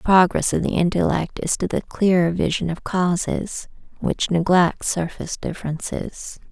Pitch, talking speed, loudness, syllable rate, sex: 175 Hz, 145 wpm, -21 LUFS, 4.6 syllables/s, female